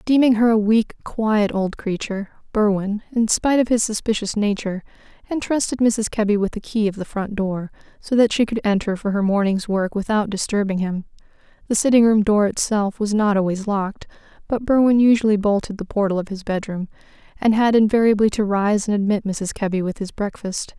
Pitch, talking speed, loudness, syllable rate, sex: 210 Hz, 190 wpm, -20 LUFS, 5.5 syllables/s, female